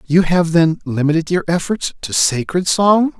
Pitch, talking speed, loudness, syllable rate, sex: 165 Hz, 170 wpm, -16 LUFS, 4.5 syllables/s, male